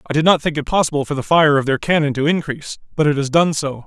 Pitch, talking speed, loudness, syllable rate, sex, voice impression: 150 Hz, 295 wpm, -17 LUFS, 6.7 syllables/s, male, masculine, adult-like, slightly powerful, slightly clear, slightly refreshing